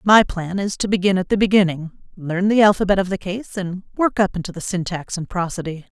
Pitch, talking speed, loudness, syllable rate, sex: 190 Hz, 220 wpm, -20 LUFS, 5.7 syllables/s, female